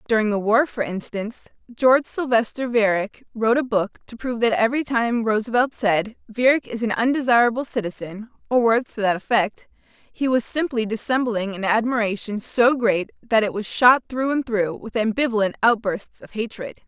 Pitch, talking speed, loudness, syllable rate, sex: 230 Hz, 170 wpm, -21 LUFS, 5.3 syllables/s, female